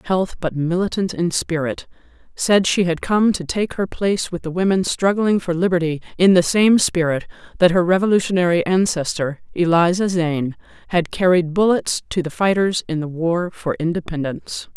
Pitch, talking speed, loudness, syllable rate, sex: 175 Hz, 165 wpm, -19 LUFS, 5.0 syllables/s, female